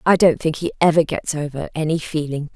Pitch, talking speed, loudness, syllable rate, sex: 155 Hz, 210 wpm, -20 LUFS, 5.7 syllables/s, female